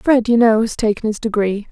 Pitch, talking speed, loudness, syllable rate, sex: 220 Hz, 245 wpm, -16 LUFS, 5.5 syllables/s, female